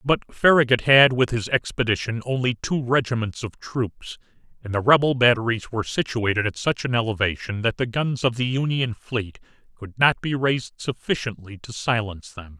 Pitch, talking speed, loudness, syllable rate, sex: 120 Hz, 170 wpm, -22 LUFS, 5.2 syllables/s, male